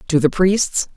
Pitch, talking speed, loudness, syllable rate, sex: 175 Hz, 190 wpm, -17 LUFS, 4.0 syllables/s, female